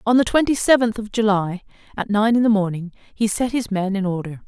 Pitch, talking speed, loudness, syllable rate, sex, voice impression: 210 Hz, 230 wpm, -20 LUFS, 5.6 syllables/s, female, very feminine, middle-aged, thin, tensed, slightly weak, slightly dark, slightly hard, clear, fluent, slightly cute, intellectual, very refreshing, sincere, calm, friendly, reassuring, unique, very elegant, sweet, slightly lively, slightly strict, slightly intense, sharp